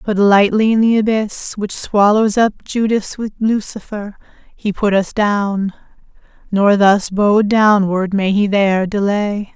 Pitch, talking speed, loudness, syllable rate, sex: 205 Hz, 145 wpm, -15 LUFS, 4.0 syllables/s, female